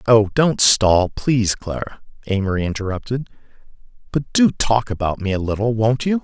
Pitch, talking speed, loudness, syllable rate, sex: 110 Hz, 155 wpm, -19 LUFS, 5.0 syllables/s, male